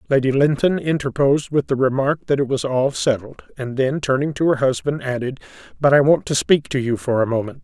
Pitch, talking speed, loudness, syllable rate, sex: 135 Hz, 220 wpm, -19 LUFS, 5.7 syllables/s, male